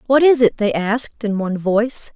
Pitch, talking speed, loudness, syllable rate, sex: 225 Hz, 225 wpm, -17 LUFS, 5.6 syllables/s, female